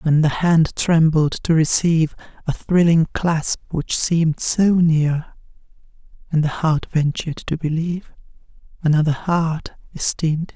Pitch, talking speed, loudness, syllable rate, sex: 160 Hz, 135 wpm, -19 LUFS, 4.5 syllables/s, female